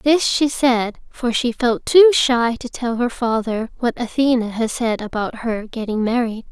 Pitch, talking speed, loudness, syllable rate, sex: 240 Hz, 185 wpm, -19 LUFS, 4.3 syllables/s, female